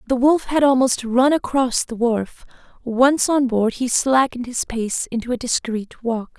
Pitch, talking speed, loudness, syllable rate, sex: 245 Hz, 180 wpm, -19 LUFS, 4.4 syllables/s, female